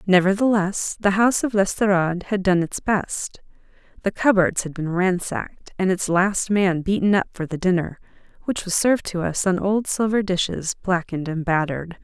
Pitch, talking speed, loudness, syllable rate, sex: 190 Hz, 175 wpm, -21 LUFS, 5.1 syllables/s, female